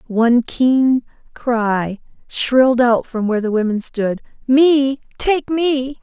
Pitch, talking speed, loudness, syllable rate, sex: 250 Hz, 130 wpm, -16 LUFS, 3.5 syllables/s, female